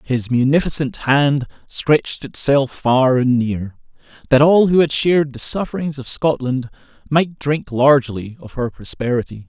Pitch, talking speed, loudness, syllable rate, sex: 135 Hz, 145 wpm, -17 LUFS, 4.5 syllables/s, male